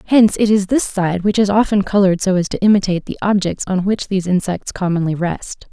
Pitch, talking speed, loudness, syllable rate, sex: 195 Hz, 220 wpm, -16 LUFS, 6.1 syllables/s, female